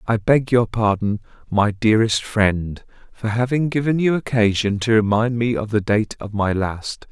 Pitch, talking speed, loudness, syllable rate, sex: 110 Hz, 175 wpm, -19 LUFS, 4.5 syllables/s, male